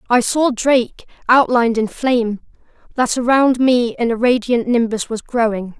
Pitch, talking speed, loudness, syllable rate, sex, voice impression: 240 Hz, 145 wpm, -16 LUFS, 4.6 syllables/s, female, masculine, young, tensed, powerful, bright, clear, slightly cute, refreshing, friendly, reassuring, lively, intense